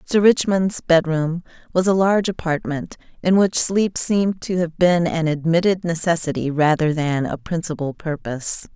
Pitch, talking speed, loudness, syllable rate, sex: 170 Hz, 150 wpm, -20 LUFS, 4.7 syllables/s, female